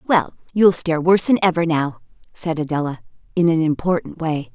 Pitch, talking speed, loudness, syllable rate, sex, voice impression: 165 Hz, 170 wpm, -19 LUFS, 5.5 syllables/s, female, feminine, adult-like, tensed, powerful, bright, clear, slightly fluent, friendly, slightly elegant, lively, slightly intense